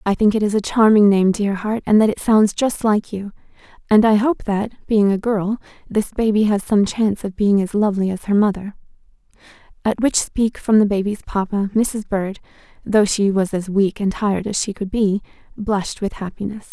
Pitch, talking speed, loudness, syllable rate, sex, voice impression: 205 Hz, 210 wpm, -18 LUFS, 5.1 syllables/s, female, feminine, very adult-like, middle-aged, slightly thin, slightly relaxed, slightly weak, slightly dark, slightly hard, slightly muffled, fluent, slightly cool, intellectual, slightly refreshing, sincere, calm, friendly, reassuring, slightly unique, elegant, slightly sweet, slightly lively, kind, slightly modest